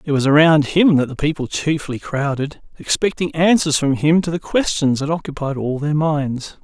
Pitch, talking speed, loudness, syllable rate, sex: 150 Hz, 190 wpm, -18 LUFS, 4.9 syllables/s, male